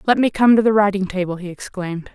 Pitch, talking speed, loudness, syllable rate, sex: 195 Hz, 250 wpm, -18 LUFS, 6.4 syllables/s, female